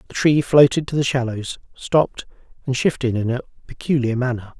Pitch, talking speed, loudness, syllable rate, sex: 130 Hz, 170 wpm, -19 LUFS, 5.6 syllables/s, male